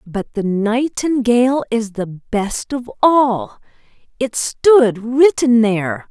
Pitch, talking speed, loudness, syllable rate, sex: 235 Hz, 110 wpm, -16 LUFS, 3.3 syllables/s, female